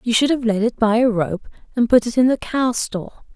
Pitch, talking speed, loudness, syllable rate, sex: 235 Hz, 270 wpm, -18 LUFS, 5.4 syllables/s, female